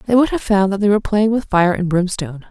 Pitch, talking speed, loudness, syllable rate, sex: 200 Hz, 285 wpm, -16 LUFS, 6.2 syllables/s, female